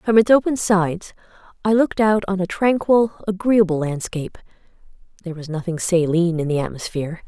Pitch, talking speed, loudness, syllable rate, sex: 190 Hz, 155 wpm, -19 LUFS, 5.8 syllables/s, female